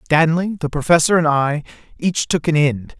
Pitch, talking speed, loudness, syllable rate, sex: 155 Hz, 180 wpm, -17 LUFS, 4.8 syllables/s, male